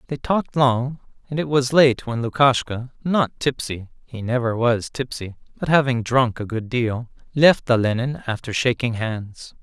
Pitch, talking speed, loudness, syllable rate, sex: 125 Hz, 160 wpm, -21 LUFS, 4.1 syllables/s, male